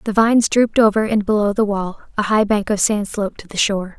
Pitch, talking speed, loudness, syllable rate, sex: 210 Hz, 255 wpm, -17 LUFS, 6.2 syllables/s, female